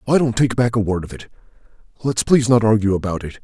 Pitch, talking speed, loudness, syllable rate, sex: 110 Hz, 245 wpm, -18 LUFS, 6.7 syllables/s, male